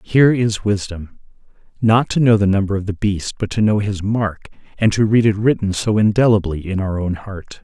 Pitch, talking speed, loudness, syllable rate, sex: 105 Hz, 210 wpm, -17 LUFS, 5.2 syllables/s, male